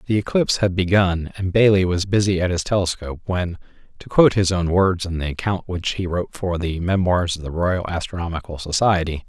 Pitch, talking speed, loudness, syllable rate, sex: 90 Hz, 200 wpm, -20 LUFS, 5.7 syllables/s, male